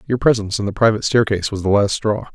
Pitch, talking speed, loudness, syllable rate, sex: 105 Hz, 255 wpm, -18 LUFS, 7.4 syllables/s, male